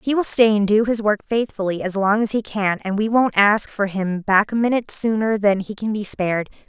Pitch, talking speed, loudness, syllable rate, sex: 210 Hz, 250 wpm, -19 LUFS, 5.3 syllables/s, female